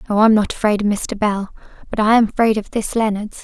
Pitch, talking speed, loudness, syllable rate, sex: 210 Hz, 245 wpm, -17 LUFS, 5.9 syllables/s, female